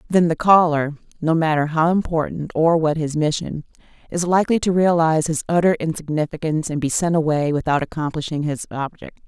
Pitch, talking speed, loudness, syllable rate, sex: 160 Hz, 170 wpm, -20 LUFS, 5.7 syllables/s, female